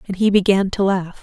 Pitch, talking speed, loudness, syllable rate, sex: 195 Hz, 245 wpm, -17 LUFS, 5.6 syllables/s, female